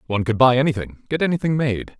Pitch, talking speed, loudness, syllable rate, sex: 130 Hz, 210 wpm, -20 LUFS, 6.9 syllables/s, male